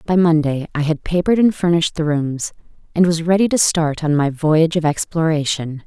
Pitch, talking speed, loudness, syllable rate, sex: 160 Hz, 195 wpm, -17 LUFS, 5.5 syllables/s, female